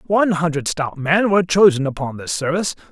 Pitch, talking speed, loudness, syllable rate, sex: 165 Hz, 185 wpm, -18 LUFS, 6.1 syllables/s, male